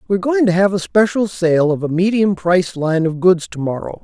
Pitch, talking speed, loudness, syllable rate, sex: 185 Hz, 240 wpm, -16 LUFS, 5.4 syllables/s, male